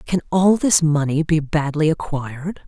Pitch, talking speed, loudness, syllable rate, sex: 160 Hz, 155 wpm, -18 LUFS, 4.6 syllables/s, female